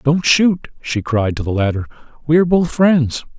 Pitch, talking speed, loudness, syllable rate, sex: 140 Hz, 195 wpm, -16 LUFS, 4.9 syllables/s, male